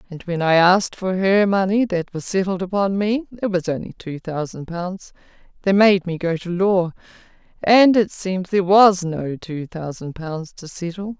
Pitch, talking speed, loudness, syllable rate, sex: 185 Hz, 175 wpm, -19 LUFS, 4.6 syllables/s, female